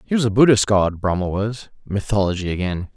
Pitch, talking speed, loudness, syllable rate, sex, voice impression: 105 Hz, 180 wpm, -19 LUFS, 5.6 syllables/s, male, masculine, adult-like, slightly halting, slightly refreshing, slightly wild